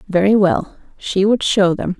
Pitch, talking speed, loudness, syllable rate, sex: 195 Hz, 180 wpm, -16 LUFS, 4.3 syllables/s, female